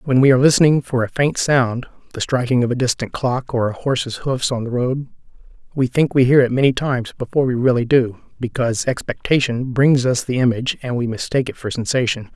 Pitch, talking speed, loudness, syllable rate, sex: 125 Hz, 205 wpm, -18 LUFS, 6.0 syllables/s, male